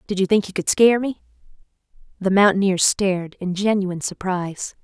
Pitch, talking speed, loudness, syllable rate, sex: 190 Hz, 160 wpm, -20 LUFS, 5.7 syllables/s, female